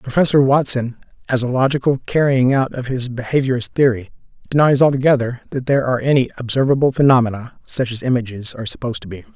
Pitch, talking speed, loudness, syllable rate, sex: 130 Hz, 165 wpm, -17 LUFS, 6.6 syllables/s, male